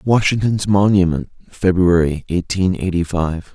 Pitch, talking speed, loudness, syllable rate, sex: 90 Hz, 100 wpm, -17 LUFS, 4.3 syllables/s, male